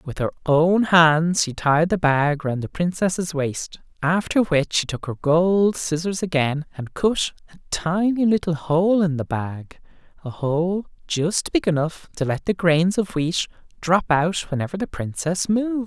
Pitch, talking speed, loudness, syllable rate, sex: 170 Hz, 175 wpm, -21 LUFS, 4.1 syllables/s, male